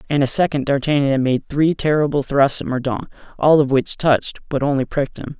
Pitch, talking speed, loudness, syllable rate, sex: 140 Hz, 210 wpm, -18 LUFS, 5.8 syllables/s, male